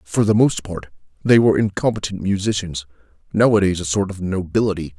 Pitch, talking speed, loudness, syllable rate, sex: 100 Hz, 145 wpm, -19 LUFS, 5.8 syllables/s, male